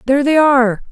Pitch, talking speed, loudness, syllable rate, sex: 265 Hz, 195 wpm, -12 LUFS, 7.1 syllables/s, female